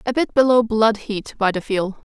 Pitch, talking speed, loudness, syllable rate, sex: 220 Hz, 225 wpm, -19 LUFS, 4.8 syllables/s, female